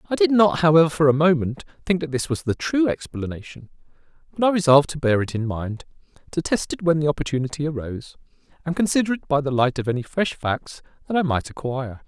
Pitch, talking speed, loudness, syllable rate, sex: 155 Hz, 215 wpm, -21 LUFS, 6.3 syllables/s, male